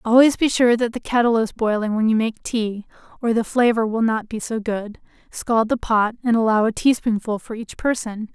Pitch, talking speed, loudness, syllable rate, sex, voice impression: 225 Hz, 225 wpm, -20 LUFS, 5.1 syllables/s, female, feminine, very adult-like, slightly tensed, sincere, slightly elegant, slightly sweet